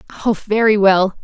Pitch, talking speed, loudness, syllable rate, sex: 205 Hz, 145 wpm, -15 LUFS, 5.9 syllables/s, female